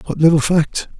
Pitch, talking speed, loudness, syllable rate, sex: 155 Hz, 180 wpm, -15 LUFS, 5.3 syllables/s, male